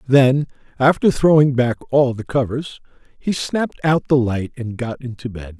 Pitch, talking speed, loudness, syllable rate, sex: 130 Hz, 170 wpm, -18 LUFS, 4.4 syllables/s, male